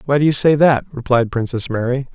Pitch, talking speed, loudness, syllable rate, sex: 130 Hz, 225 wpm, -16 LUFS, 5.7 syllables/s, male